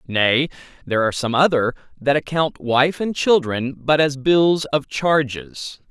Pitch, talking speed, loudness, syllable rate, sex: 140 Hz, 150 wpm, -19 LUFS, 4.1 syllables/s, male